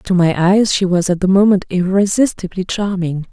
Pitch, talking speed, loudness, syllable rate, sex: 190 Hz, 180 wpm, -15 LUFS, 5.0 syllables/s, female